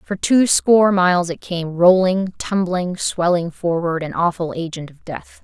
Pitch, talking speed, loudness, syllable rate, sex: 175 Hz, 165 wpm, -18 LUFS, 4.3 syllables/s, female